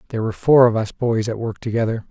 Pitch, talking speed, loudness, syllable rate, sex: 115 Hz, 255 wpm, -19 LUFS, 7.1 syllables/s, male